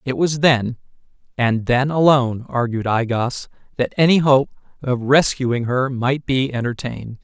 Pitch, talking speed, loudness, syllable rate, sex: 130 Hz, 150 wpm, -18 LUFS, 4.4 syllables/s, male